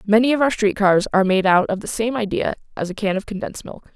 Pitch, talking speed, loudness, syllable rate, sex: 210 Hz, 275 wpm, -19 LUFS, 6.4 syllables/s, female